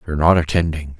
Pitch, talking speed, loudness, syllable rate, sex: 80 Hz, 180 wpm, -18 LUFS, 7.1 syllables/s, male